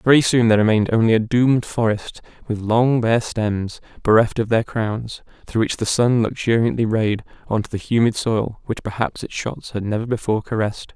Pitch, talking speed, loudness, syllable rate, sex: 110 Hz, 190 wpm, -20 LUFS, 5.4 syllables/s, male